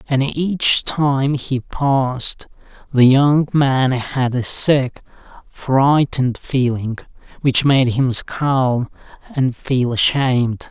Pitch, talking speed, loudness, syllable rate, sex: 135 Hz, 110 wpm, -17 LUFS, 3.0 syllables/s, male